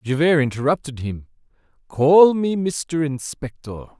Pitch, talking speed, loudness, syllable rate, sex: 145 Hz, 105 wpm, -19 LUFS, 4.1 syllables/s, male